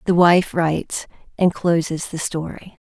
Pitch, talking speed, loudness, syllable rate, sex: 170 Hz, 145 wpm, -20 LUFS, 4.3 syllables/s, female